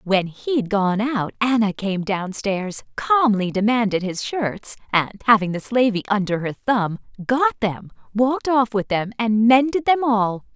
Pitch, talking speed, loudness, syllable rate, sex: 220 Hz, 160 wpm, -20 LUFS, 4.1 syllables/s, female